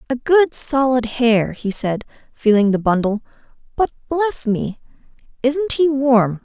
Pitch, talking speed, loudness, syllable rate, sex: 240 Hz, 140 wpm, -18 LUFS, 4.2 syllables/s, female